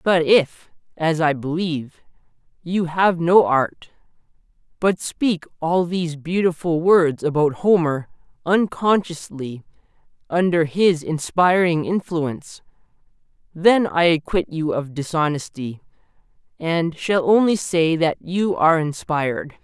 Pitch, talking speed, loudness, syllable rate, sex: 165 Hz, 110 wpm, -20 LUFS, 4.0 syllables/s, male